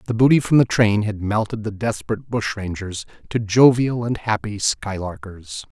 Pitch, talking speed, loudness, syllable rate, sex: 110 Hz, 155 wpm, -20 LUFS, 4.9 syllables/s, male